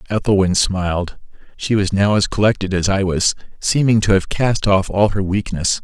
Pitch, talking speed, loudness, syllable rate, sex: 100 Hz, 175 wpm, -17 LUFS, 5.0 syllables/s, male